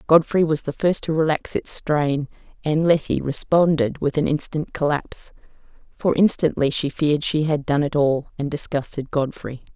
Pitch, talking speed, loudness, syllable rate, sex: 150 Hz, 165 wpm, -21 LUFS, 4.8 syllables/s, female